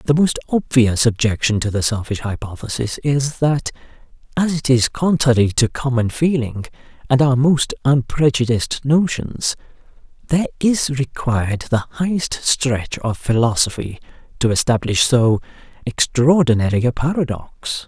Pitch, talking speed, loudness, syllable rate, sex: 130 Hz, 120 wpm, -18 LUFS, 4.5 syllables/s, male